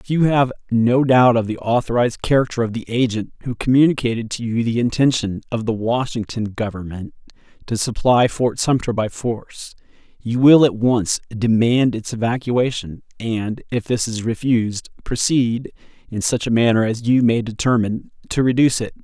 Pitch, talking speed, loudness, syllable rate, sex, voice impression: 120 Hz, 165 wpm, -19 LUFS, 5.1 syllables/s, male, very masculine, adult-like, thick, slightly tensed, slightly powerful, bright, slightly hard, clear, fluent, slightly raspy, cool, intellectual, refreshing, slightly sincere, calm, slightly mature, friendly, reassuring, slightly unique, slightly elegant, wild, slightly sweet, lively, kind, slightly modest